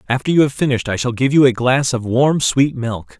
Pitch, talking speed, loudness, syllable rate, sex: 130 Hz, 265 wpm, -16 LUFS, 5.7 syllables/s, male